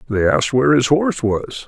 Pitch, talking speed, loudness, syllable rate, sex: 135 Hz, 215 wpm, -17 LUFS, 6.1 syllables/s, male